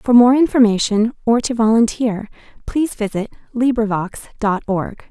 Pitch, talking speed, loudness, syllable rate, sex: 225 Hz, 130 wpm, -17 LUFS, 5.0 syllables/s, female